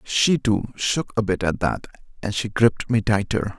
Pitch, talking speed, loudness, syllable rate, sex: 105 Hz, 200 wpm, -22 LUFS, 4.5 syllables/s, male